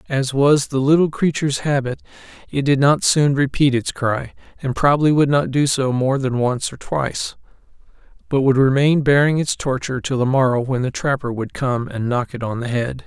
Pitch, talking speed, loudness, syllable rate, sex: 135 Hz, 200 wpm, -18 LUFS, 5.2 syllables/s, male